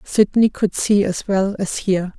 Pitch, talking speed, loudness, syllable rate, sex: 195 Hz, 190 wpm, -18 LUFS, 3.9 syllables/s, female